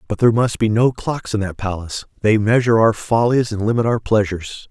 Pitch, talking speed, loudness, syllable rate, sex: 110 Hz, 205 wpm, -18 LUFS, 6.0 syllables/s, male